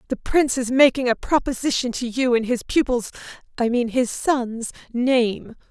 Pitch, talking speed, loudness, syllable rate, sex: 250 Hz, 145 wpm, -21 LUFS, 4.7 syllables/s, female